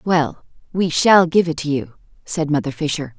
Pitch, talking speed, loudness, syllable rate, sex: 155 Hz, 190 wpm, -18 LUFS, 4.7 syllables/s, female